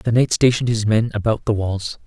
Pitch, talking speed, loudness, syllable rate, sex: 110 Hz, 230 wpm, -19 LUFS, 5.6 syllables/s, male